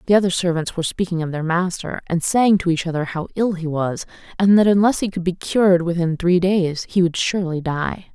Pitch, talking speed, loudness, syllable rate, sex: 175 Hz, 230 wpm, -19 LUFS, 5.6 syllables/s, female